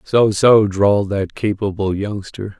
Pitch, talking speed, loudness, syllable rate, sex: 100 Hz, 140 wpm, -17 LUFS, 4.0 syllables/s, male